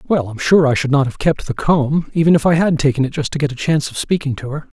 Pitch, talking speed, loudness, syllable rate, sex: 145 Hz, 315 wpm, -16 LUFS, 6.4 syllables/s, male